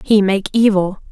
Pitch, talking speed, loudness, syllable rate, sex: 200 Hz, 160 wpm, -15 LUFS, 4.7 syllables/s, female